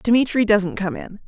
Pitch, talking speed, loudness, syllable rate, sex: 215 Hz, 190 wpm, -19 LUFS, 4.2 syllables/s, female